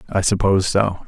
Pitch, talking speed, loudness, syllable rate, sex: 95 Hz, 170 wpm, -18 LUFS, 6.0 syllables/s, male